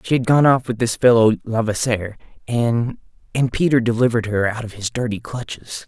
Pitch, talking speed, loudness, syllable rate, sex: 115 Hz, 185 wpm, -19 LUFS, 5.4 syllables/s, male